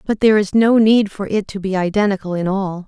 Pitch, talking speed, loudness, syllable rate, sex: 200 Hz, 250 wpm, -16 LUFS, 5.8 syllables/s, female